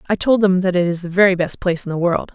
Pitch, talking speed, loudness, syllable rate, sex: 185 Hz, 335 wpm, -17 LUFS, 6.9 syllables/s, female